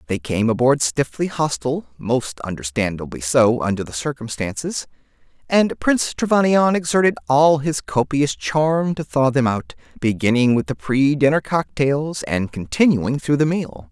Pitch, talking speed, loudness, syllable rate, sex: 130 Hz, 140 wpm, -19 LUFS, 4.6 syllables/s, male